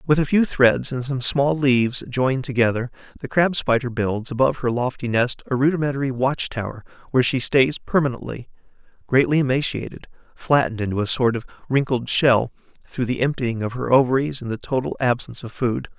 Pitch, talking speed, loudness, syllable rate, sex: 130 Hz, 175 wpm, -21 LUFS, 5.7 syllables/s, male